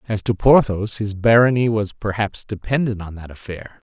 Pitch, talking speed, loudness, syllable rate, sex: 105 Hz, 170 wpm, -18 LUFS, 4.9 syllables/s, male